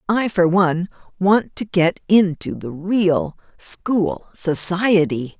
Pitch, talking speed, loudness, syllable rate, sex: 185 Hz, 120 wpm, -18 LUFS, 3.3 syllables/s, female